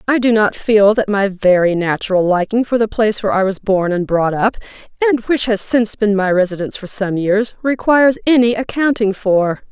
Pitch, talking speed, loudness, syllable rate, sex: 210 Hz, 200 wpm, -15 LUFS, 5.4 syllables/s, female